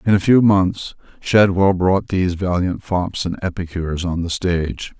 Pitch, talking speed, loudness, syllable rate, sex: 90 Hz, 170 wpm, -18 LUFS, 4.6 syllables/s, male